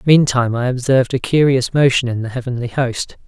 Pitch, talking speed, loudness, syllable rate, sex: 125 Hz, 185 wpm, -16 LUFS, 5.8 syllables/s, male